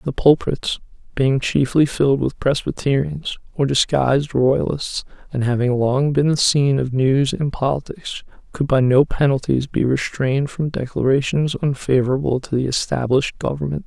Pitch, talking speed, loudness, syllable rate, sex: 135 Hz, 145 wpm, -19 LUFS, 4.9 syllables/s, male